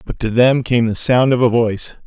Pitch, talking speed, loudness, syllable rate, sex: 120 Hz, 260 wpm, -15 LUFS, 5.3 syllables/s, male